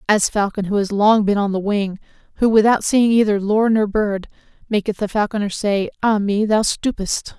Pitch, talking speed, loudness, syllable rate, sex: 210 Hz, 195 wpm, -18 LUFS, 5.0 syllables/s, female